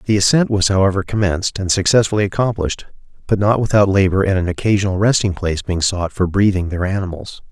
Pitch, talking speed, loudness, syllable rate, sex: 95 Hz, 185 wpm, -17 LUFS, 6.4 syllables/s, male